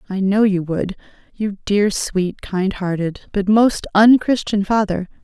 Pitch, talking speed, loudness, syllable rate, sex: 200 Hz, 160 wpm, -18 LUFS, 3.9 syllables/s, female